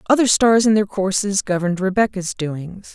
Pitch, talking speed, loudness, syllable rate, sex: 200 Hz, 165 wpm, -18 LUFS, 5.1 syllables/s, female